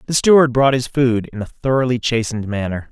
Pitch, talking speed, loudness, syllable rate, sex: 125 Hz, 205 wpm, -17 LUFS, 5.9 syllables/s, male